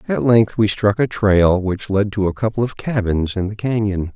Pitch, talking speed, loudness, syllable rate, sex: 105 Hz, 230 wpm, -18 LUFS, 4.8 syllables/s, male